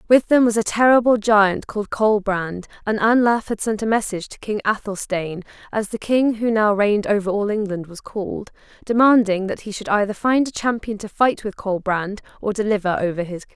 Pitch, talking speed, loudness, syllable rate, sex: 210 Hz, 200 wpm, -20 LUFS, 5.5 syllables/s, female